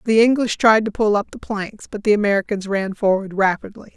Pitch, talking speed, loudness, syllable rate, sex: 205 Hz, 210 wpm, -19 LUFS, 5.6 syllables/s, female